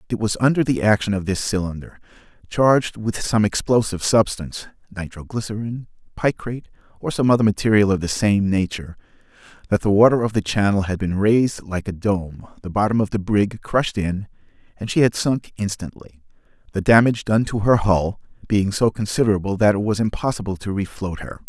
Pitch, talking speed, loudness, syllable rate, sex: 105 Hz, 180 wpm, -20 LUFS, 5.8 syllables/s, male